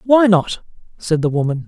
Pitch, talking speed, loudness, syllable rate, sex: 185 Hz, 180 wpm, -16 LUFS, 4.8 syllables/s, male